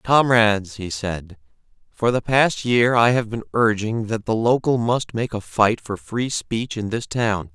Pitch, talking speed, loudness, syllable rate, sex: 115 Hz, 190 wpm, -20 LUFS, 4.1 syllables/s, male